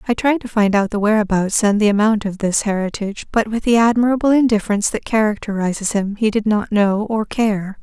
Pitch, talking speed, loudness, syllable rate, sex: 215 Hz, 205 wpm, -17 LUFS, 5.8 syllables/s, female